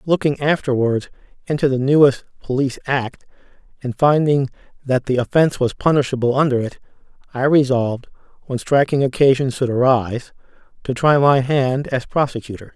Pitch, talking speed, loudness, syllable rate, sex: 135 Hz, 135 wpm, -18 LUFS, 5.5 syllables/s, male